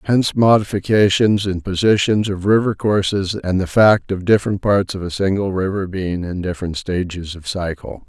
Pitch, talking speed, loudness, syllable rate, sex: 95 Hz, 170 wpm, -18 LUFS, 5.1 syllables/s, male